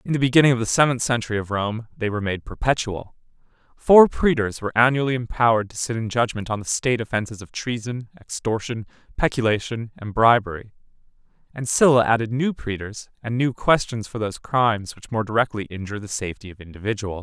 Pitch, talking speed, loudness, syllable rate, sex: 115 Hz, 180 wpm, -22 LUFS, 6.1 syllables/s, male